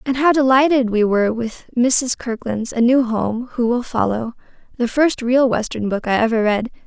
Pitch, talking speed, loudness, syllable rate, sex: 240 Hz, 185 wpm, -18 LUFS, 4.7 syllables/s, female